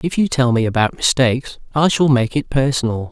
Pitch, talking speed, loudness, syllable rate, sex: 130 Hz, 210 wpm, -17 LUFS, 5.6 syllables/s, male